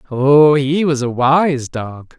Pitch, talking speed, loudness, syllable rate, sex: 140 Hz, 165 wpm, -14 LUFS, 3.1 syllables/s, male